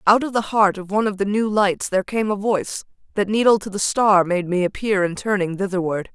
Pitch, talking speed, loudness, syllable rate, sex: 200 Hz, 245 wpm, -20 LUFS, 5.8 syllables/s, female